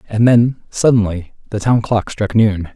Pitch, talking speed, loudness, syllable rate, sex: 110 Hz, 175 wpm, -15 LUFS, 4.3 syllables/s, male